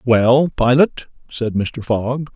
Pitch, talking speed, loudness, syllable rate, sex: 125 Hz, 130 wpm, -17 LUFS, 3.0 syllables/s, male